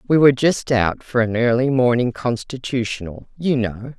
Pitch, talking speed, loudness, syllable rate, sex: 125 Hz, 165 wpm, -19 LUFS, 4.9 syllables/s, female